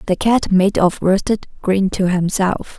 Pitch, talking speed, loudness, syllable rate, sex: 190 Hz, 170 wpm, -17 LUFS, 4.5 syllables/s, female